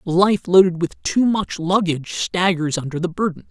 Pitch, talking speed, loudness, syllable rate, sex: 170 Hz, 170 wpm, -19 LUFS, 4.7 syllables/s, male